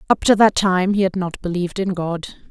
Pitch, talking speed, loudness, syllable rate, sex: 185 Hz, 240 wpm, -19 LUFS, 5.4 syllables/s, female